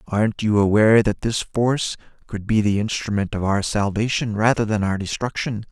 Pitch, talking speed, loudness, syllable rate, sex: 105 Hz, 180 wpm, -20 LUFS, 5.3 syllables/s, male